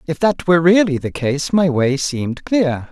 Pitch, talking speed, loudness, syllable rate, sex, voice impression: 155 Hz, 205 wpm, -16 LUFS, 4.7 syllables/s, male, masculine, adult-like, slightly bright, refreshing, slightly sincere, friendly, reassuring, slightly kind